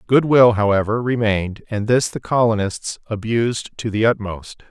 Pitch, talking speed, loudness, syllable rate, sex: 110 Hz, 155 wpm, -19 LUFS, 4.9 syllables/s, male